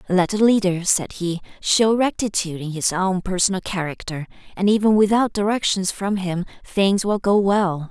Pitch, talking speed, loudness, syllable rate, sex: 190 Hz, 165 wpm, -20 LUFS, 4.9 syllables/s, female